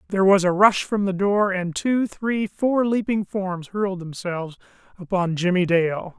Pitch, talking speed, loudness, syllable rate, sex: 190 Hz, 175 wpm, -22 LUFS, 4.5 syllables/s, male